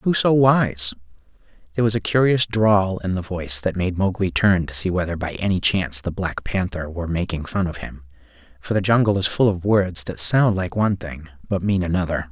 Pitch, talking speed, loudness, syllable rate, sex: 95 Hz, 215 wpm, -20 LUFS, 5.5 syllables/s, male